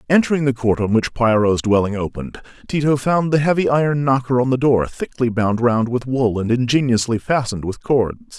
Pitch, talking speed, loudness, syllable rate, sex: 125 Hz, 195 wpm, -18 LUFS, 5.4 syllables/s, male